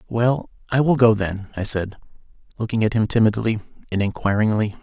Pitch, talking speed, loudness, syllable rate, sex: 110 Hz, 160 wpm, -21 LUFS, 5.5 syllables/s, male